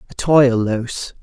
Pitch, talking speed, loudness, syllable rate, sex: 125 Hz, 145 wpm, -16 LUFS, 4.1 syllables/s, male